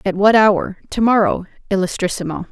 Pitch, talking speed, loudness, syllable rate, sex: 195 Hz, 145 wpm, -17 LUFS, 5.3 syllables/s, female